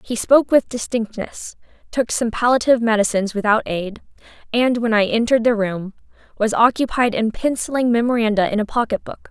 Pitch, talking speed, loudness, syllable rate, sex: 225 Hz, 150 wpm, -18 LUFS, 5.7 syllables/s, female